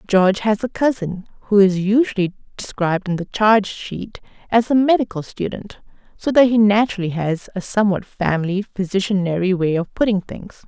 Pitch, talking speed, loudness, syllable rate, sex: 200 Hz, 165 wpm, -18 LUFS, 5.5 syllables/s, female